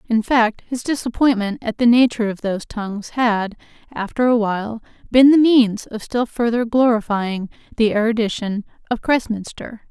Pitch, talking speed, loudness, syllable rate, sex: 225 Hz, 150 wpm, -18 LUFS, 5.0 syllables/s, female